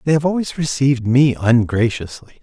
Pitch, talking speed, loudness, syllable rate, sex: 130 Hz, 150 wpm, -16 LUFS, 5.4 syllables/s, male